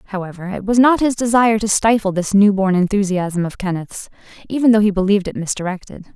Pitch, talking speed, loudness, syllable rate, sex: 200 Hz, 195 wpm, -17 LUFS, 6.3 syllables/s, female